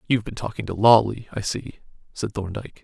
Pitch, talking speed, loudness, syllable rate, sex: 110 Hz, 190 wpm, -23 LUFS, 6.0 syllables/s, male